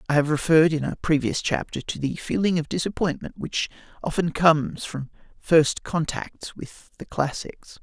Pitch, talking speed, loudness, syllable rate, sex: 155 Hz, 160 wpm, -24 LUFS, 4.8 syllables/s, male